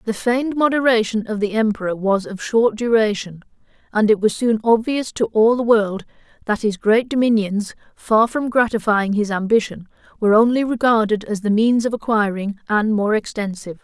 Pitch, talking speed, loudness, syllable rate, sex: 220 Hz, 170 wpm, -18 LUFS, 5.2 syllables/s, female